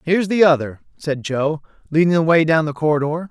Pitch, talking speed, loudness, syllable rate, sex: 160 Hz, 200 wpm, -17 LUFS, 5.8 syllables/s, male